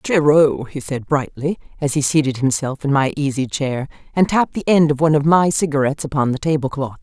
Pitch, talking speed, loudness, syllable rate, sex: 145 Hz, 205 wpm, -18 LUFS, 5.7 syllables/s, female